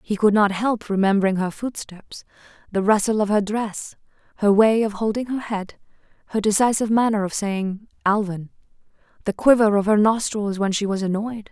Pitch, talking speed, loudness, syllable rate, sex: 210 Hz, 170 wpm, -21 LUFS, 5.2 syllables/s, female